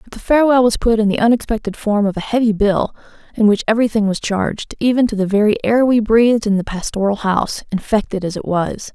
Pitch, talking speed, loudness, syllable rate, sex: 215 Hz, 220 wpm, -16 LUFS, 6.2 syllables/s, female